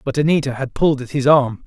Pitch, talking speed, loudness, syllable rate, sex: 135 Hz, 250 wpm, -17 LUFS, 6.4 syllables/s, male